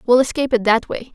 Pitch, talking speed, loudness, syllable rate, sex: 245 Hz, 265 wpm, -17 LUFS, 6.9 syllables/s, female